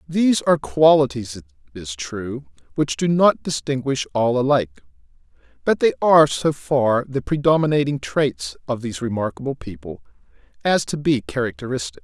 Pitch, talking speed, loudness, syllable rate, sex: 130 Hz, 140 wpm, -20 LUFS, 5.2 syllables/s, male